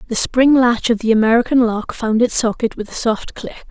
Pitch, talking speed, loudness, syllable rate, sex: 230 Hz, 225 wpm, -16 LUFS, 5.3 syllables/s, female